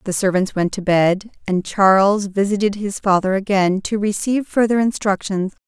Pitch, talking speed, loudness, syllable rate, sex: 200 Hz, 160 wpm, -18 LUFS, 4.9 syllables/s, female